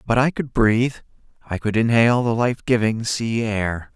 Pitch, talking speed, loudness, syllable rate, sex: 115 Hz, 180 wpm, -20 LUFS, 4.8 syllables/s, male